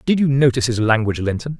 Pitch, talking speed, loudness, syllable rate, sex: 125 Hz, 225 wpm, -18 LUFS, 7.4 syllables/s, male